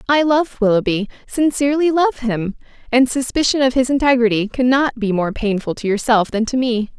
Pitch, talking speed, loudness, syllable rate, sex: 245 Hz, 170 wpm, -17 LUFS, 5.4 syllables/s, female